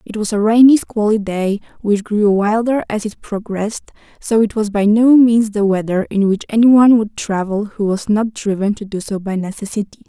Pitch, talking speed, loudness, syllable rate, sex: 210 Hz, 200 wpm, -15 LUFS, 5.1 syllables/s, female